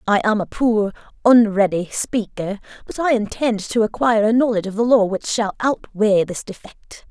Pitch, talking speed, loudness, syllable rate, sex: 215 Hz, 175 wpm, -19 LUFS, 4.9 syllables/s, female